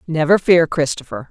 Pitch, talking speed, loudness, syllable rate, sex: 165 Hz, 140 wpm, -15 LUFS, 5.1 syllables/s, female